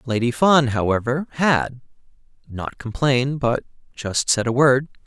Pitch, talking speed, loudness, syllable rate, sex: 130 Hz, 120 wpm, -20 LUFS, 4.3 syllables/s, male